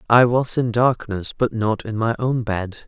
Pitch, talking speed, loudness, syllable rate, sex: 115 Hz, 210 wpm, -20 LUFS, 4.4 syllables/s, male